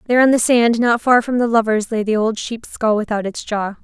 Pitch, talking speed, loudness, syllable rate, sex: 225 Hz, 265 wpm, -17 LUFS, 5.5 syllables/s, female